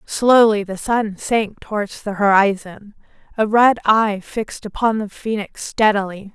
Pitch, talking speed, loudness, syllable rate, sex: 210 Hz, 140 wpm, -18 LUFS, 4.2 syllables/s, female